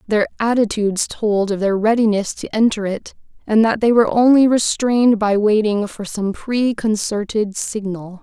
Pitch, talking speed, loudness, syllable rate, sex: 215 Hz, 155 wpm, -17 LUFS, 4.7 syllables/s, female